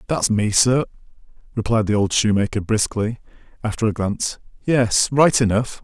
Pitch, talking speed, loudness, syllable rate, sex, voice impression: 110 Hz, 135 wpm, -19 LUFS, 5.0 syllables/s, male, masculine, adult-like, thick, tensed, slightly bright, slightly hard, clear, slightly muffled, intellectual, calm, slightly mature, slightly friendly, reassuring, wild, slightly lively, slightly kind